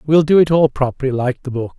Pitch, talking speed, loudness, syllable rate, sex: 140 Hz, 270 wpm, -16 LUFS, 6.1 syllables/s, male